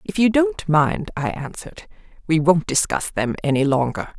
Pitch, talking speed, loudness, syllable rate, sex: 165 Hz, 170 wpm, -20 LUFS, 4.8 syllables/s, female